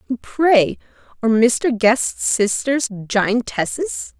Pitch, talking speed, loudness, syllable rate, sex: 240 Hz, 85 wpm, -18 LUFS, 3.2 syllables/s, female